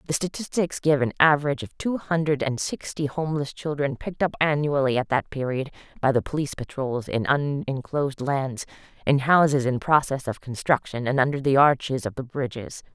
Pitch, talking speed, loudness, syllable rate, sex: 140 Hz, 175 wpm, -24 LUFS, 5.5 syllables/s, female